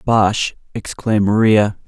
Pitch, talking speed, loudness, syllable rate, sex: 105 Hz, 95 wpm, -16 LUFS, 3.9 syllables/s, male